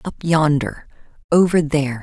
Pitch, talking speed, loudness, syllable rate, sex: 155 Hz, 120 wpm, -18 LUFS, 4.9 syllables/s, female